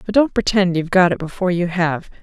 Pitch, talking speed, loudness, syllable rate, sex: 180 Hz, 245 wpm, -18 LUFS, 6.5 syllables/s, female